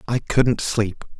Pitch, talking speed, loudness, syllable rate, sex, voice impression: 115 Hz, 150 wpm, -21 LUFS, 3.2 syllables/s, male, masculine, adult-like, tensed, powerful, bright, clear, fluent, cool, intellectual, friendly, wild, slightly lively, kind, modest